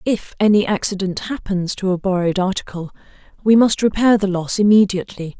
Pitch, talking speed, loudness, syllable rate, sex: 195 Hz, 155 wpm, -17 LUFS, 5.7 syllables/s, female